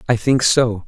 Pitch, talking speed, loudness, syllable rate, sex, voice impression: 120 Hz, 205 wpm, -16 LUFS, 4.4 syllables/s, male, masculine, adult-like, slightly thin, relaxed, slightly soft, clear, slightly nasal, cool, refreshing, friendly, reassuring, lively, kind